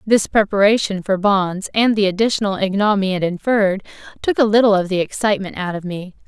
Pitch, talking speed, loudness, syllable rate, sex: 200 Hz, 180 wpm, -17 LUFS, 6.0 syllables/s, female